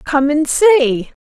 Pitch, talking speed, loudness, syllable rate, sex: 295 Hz, 145 wpm, -13 LUFS, 2.9 syllables/s, female